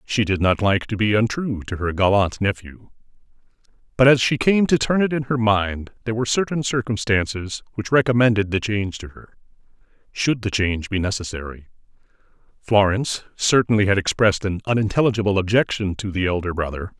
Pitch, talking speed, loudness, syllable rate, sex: 105 Hz, 160 wpm, -20 LUFS, 5.7 syllables/s, male